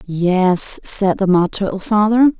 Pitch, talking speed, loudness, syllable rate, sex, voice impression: 195 Hz, 150 wpm, -15 LUFS, 3.7 syllables/s, female, very feminine, slightly young, slightly adult-like, thin, tensed, very powerful, slightly bright, slightly hard, very clear, fluent, slightly cute, cool, very intellectual, slightly refreshing, very sincere, very calm, slightly friendly, reassuring, unique, very elegant, sweet, slightly lively, very strict, slightly intense, very sharp